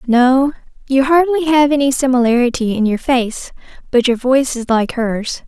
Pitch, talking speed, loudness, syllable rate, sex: 255 Hz, 165 wpm, -15 LUFS, 4.8 syllables/s, female